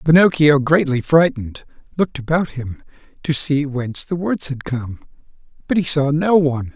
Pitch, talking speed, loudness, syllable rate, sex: 145 Hz, 160 wpm, -18 LUFS, 5.0 syllables/s, male